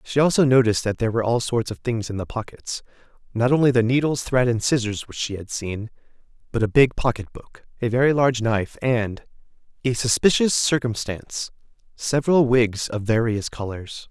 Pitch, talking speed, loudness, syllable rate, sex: 120 Hz, 170 wpm, -22 LUFS, 5.5 syllables/s, male